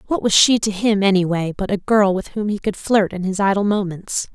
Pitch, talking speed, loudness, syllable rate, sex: 200 Hz, 250 wpm, -18 LUFS, 5.4 syllables/s, female